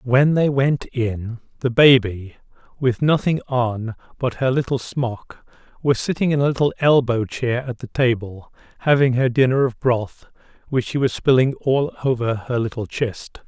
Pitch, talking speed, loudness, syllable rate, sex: 125 Hz, 165 wpm, -20 LUFS, 4.3 syllables/s, male